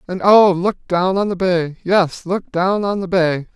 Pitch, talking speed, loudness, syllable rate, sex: 185 Hz, 220 wpm, -17 LUFS, 4.0 syllables/s, male